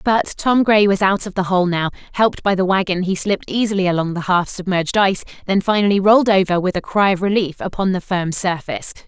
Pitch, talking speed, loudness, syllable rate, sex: 190 Hz, 225 wpm, -17 LUFS, 6.2 syllables/s, female